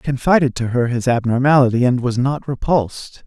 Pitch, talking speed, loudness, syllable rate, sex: 130 Hz, 185 wpm, -17 LUFS, 5.7 syllables/s, male